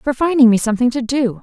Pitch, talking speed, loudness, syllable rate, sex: 250 Hz, 250 wpm, -15 LUFS, 6.5 syllables/s, female